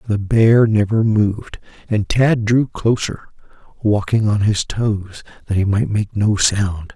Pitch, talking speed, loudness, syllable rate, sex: 105 Hz, 155 wpm, -17 LUFS, 3.9 syllables/s, male